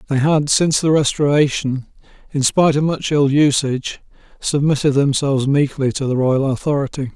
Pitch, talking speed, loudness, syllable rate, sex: 140 Hz, 150 wpm, -17 LUFS, 5.4 syllables/s, male